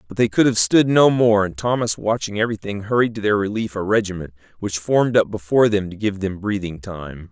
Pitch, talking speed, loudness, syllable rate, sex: 105 Hz, 220 wpm, -19 LUFS, 5.8 syllables/s, male